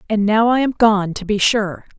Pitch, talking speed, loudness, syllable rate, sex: 210 Hz, 240 wpm, -16 LUFS, 4.7 syllables/s, female